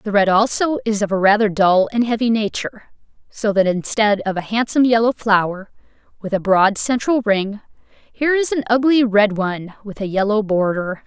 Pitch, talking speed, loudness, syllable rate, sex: 215 Hz, 185 wpm, -17 LUFS, 5.2 syllables/s, female